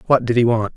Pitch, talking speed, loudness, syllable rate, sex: 120 Hz, 315 wpm, -17 LUFS, 6.8 syllables/s, male